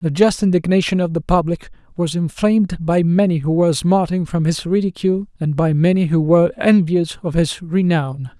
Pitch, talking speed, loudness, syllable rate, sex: 170 Hz, 180 wpm, -17 LUFS, 5.2 syllables/s, male